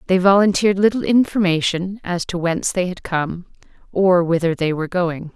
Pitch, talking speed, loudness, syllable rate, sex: 180 Hz, 170 wpm, -18 LUFS, 5.3 syllables/s, female